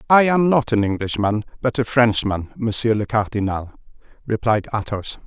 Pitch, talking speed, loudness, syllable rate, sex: 115 Hz, 150 wpm, -20 LUFS, 4.9 syllables/s, male